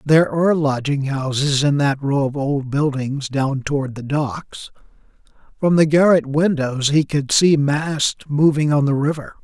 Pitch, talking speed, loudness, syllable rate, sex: 145 Hz, 165 wpm, -18 LUFS, 4.4 syllables/s, male